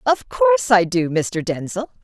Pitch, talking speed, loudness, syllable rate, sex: 170 Hz, 175 wpm, -18 LUFS, 4.4 syllables/s, female